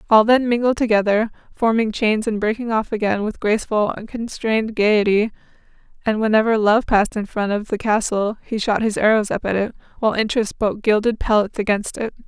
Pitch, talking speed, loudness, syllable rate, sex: 215 Hz, 180 wpm, -19 LUFS, 5.7 syllables/s, female